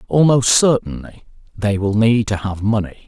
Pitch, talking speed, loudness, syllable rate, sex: 105 Hz, 155 wpm, -16 LUFS, 4.8 syllables/s, male